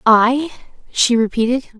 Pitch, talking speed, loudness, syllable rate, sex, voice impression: 240 Hz, 100 wpm, -16 LUFS, 4.1 syllables/s, female, very feminine, very young, very thin, relaxed, weak, slightly dark, slightly soft, very clear, very fluent, very cute, intellectual, very refreshing, slightly sincere, slightly calm, very friendly, very reassuring, very unique, slightly elegant, wild, sweet, lively, kind, slightly intense, slightly sharp, very light